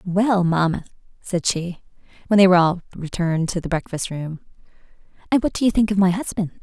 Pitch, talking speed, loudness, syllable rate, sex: 185 Hz, 190 wpm, -20 LUFS, 5.8 syllables/s, female